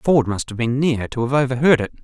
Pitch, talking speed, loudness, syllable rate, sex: 130 Hz, 265 wpm, -19 LUFS, 5.8 syllables/s, male